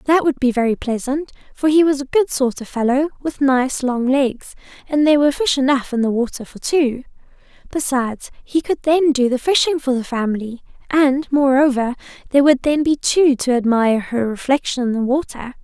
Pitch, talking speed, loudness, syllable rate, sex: 270 Hz, 195 wpm, -17 LUFS, 5.3 syllables/s, female